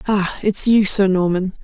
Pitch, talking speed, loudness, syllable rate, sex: 195 Hz, 185 wpm, -16 LUFS, 4.4 syllables/s, female